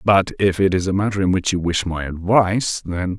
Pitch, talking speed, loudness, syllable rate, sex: 95 Hz, 245 wpm, -19 LUFS, 5.4 syllables/s, male